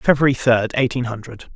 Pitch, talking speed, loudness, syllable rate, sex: 125 Hz, 155 wpm, -18 LUFS, 5.5 syllables/s, male